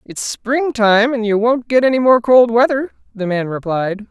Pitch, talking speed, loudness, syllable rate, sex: 230 Hz, 190 wpm, -15 LUFS, 4.8 syllables/s, female